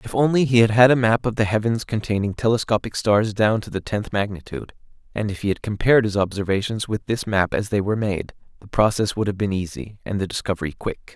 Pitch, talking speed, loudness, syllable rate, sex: 105 Hz, 225 wpm, -21 LUFS, 6.1 syllables/s, male